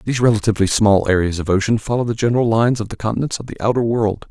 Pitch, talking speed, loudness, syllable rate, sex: 110 Hz, 235 wpm, -17 LUFS, 7.4 syllables/s, male